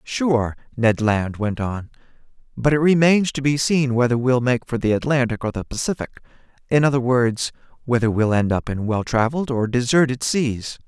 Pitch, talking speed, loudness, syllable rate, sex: 125 Hz, 180 wpm, -20 LUFS, 5.1 syllables/s, male